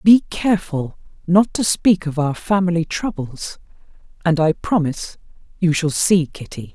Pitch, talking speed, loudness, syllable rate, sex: 170 Hz, 135 wpm, -19 LUFS, 4.6 syllables/s, female